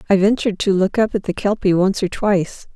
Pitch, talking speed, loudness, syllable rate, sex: 195 Hz, 240 wpm, -18 LUFS, 6.0 syllables/s, female